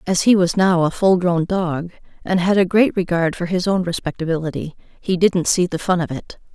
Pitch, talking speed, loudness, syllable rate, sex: 180 Hz, 220 wpm, -18 LUFS, 5.2 syllables/s, female